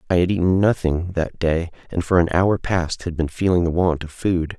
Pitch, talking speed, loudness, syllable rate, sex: 85 Hz, 235 wpm, -20 LUFS, 5.1 syllables/s, male